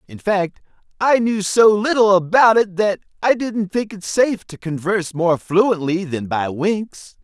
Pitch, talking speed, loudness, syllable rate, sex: 195 Hz, 175 wpm, -18 LUFS, 4.2 syllables/s, male